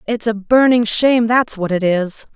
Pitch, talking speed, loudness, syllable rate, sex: 220 Hz, 205 wpm, -15 LUFS, 4.7 syllables/s, female